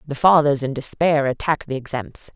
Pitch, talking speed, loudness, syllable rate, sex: 140 Hz, 180 wpm, -20 LUFS, 5.4 syllables/s, female